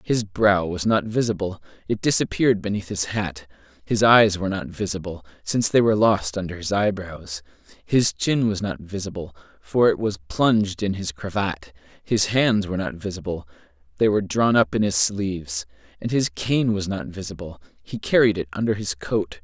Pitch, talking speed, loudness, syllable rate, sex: 95 Hz, 180 wpm, -22 LUFS, 5.2 syllables/s, male